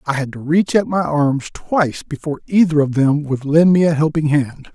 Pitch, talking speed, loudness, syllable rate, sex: 155 Hz, 225 wpm, -17 LUFS, 5.2 syllables/s, male